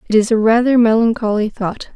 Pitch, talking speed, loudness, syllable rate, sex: 220 Hz, 185 wpm, -15 LUFS, 5.6 syllables/s, female